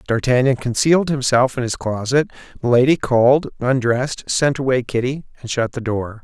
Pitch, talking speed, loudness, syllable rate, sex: 125 Hz, 155 wpm, -18 LUFS, 5.3 syllables/s, male